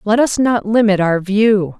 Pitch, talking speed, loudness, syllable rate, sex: 210 Hz, 200 wpm, -14 LUFS, 4.1 syllables/s, female